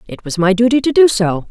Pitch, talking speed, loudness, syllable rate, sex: 220 Hz, 280 wpm, -13 LUFS, 5.9 syllables/s, female